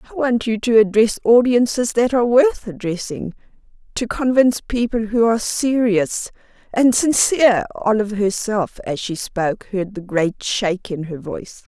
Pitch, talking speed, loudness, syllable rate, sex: 220 Hz, 150 wpm, -18 LUFS, 4.8 syllables/s, female